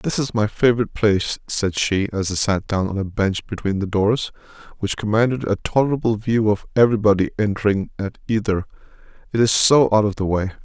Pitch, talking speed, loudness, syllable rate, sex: 105 Hz, 190 wpm, -20 LUFS, 5.8 syllables/s, male